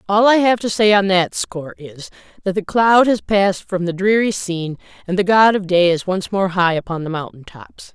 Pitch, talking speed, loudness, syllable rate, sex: 190 Hz, 235 wpm, -16 LUFS, 5.2 syllables/s, female